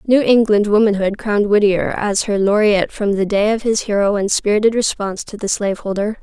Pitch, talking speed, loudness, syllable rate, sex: 205 Hz, 185 wpm, -16 LUFS, 5.8 syllables/s, female